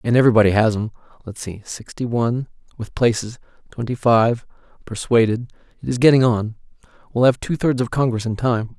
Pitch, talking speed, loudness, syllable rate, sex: 115 Hz, 165 wpm, -19 LUFS, 5.8 syllables/s, male